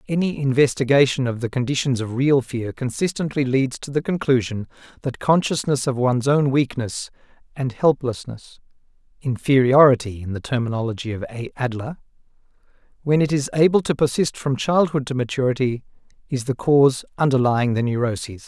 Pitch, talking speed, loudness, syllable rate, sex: 130 Hz, 135 wpm, -21 LUFS, 5.4 syllables/s, male